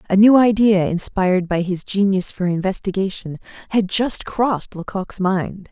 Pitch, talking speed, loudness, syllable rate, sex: 195 Hz, 145 wpm, -18 LUFS, 4.6 syllables/s, female